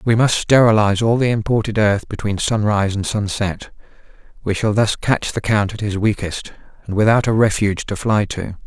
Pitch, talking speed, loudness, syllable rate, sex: 105 Hz, 185 wpm, -18 LUFS, 5.4 syllables/s, male